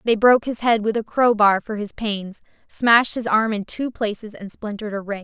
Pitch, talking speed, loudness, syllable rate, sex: 215 Hz, 230 wpm, -20 LUFS, 5.4 syllables/s, female